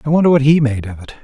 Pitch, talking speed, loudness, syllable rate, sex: 135 Hz, 340 wpm, -14 LUFS, 8.3 syllables/s, male